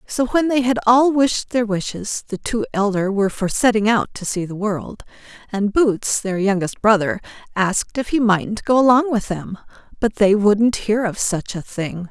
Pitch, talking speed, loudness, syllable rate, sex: 215 Hz, 200 wpm, -19 LUFS, 4.5 syllables/s, female